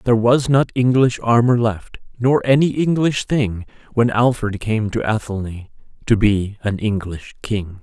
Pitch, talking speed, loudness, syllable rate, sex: 115 Hz, 155 wpm, -18 LUFS, 4.3 syllables/s, male